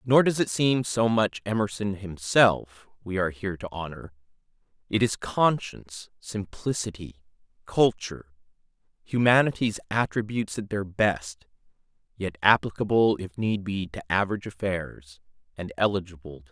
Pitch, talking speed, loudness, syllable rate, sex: 100 Hz, 125 wpm, -26 LUFS, 5.0 syllables/s, male